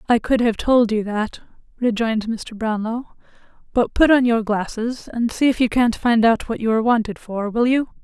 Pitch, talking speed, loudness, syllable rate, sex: 230 Hz, 210 wpm, -19 LUFS, 5.0 syllables/s, female